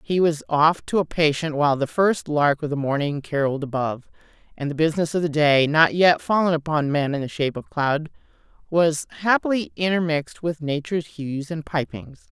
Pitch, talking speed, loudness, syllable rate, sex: 155 Hz, 190 wpm, -22 LUFS, 5.4 syllables/s, female